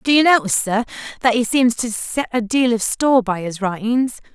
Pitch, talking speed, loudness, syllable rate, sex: 235 Hz, 220 wpm, -18 LUFS, 5.4 syllables/s, female